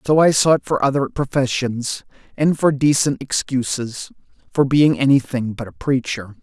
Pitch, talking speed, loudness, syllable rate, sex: 135 Hz, 150 wpm, -18 LUFS, 4.5 syllables/s, male